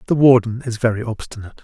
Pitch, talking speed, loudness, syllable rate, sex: 115 Hz, 185 wpm, -17 LUFS, 7.4 syllables/s, male